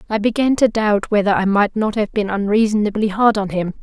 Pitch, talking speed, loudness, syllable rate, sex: 210 Hz, 220 wpm, -17 LUFS, 5.6 syllables/s, female